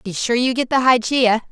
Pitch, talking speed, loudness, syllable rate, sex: 240 Hz, 240 wpm, -17 LUFS, 5.0 syllables/s, female